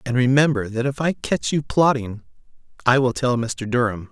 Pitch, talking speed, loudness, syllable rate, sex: 125 Hz, 190 wpm, -20 LUFS, 5.0 syllables/s, male